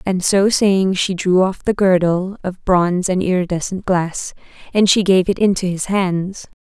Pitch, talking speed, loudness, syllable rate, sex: 185 Hz, 180 wpm, -17 LUFS, 4.4 syllables/s, female